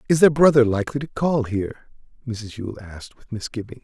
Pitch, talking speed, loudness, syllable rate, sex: 120 Hz, 190 wpm, -21 LUFS, 5.9 syllables/s, male